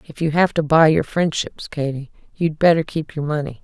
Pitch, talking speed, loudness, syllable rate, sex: 155 Hz, 215 wpm, -19 LUFS, 5.2 syllables/s, female